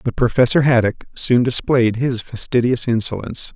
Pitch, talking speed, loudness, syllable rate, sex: 120 Hz, 135 wpm, -17 LUFS, 5.0 syllables/s, male